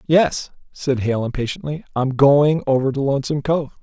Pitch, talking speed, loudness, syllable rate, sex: 140 Hz, 155 wpm, -19 LUFS, 5.2 syllables/s, male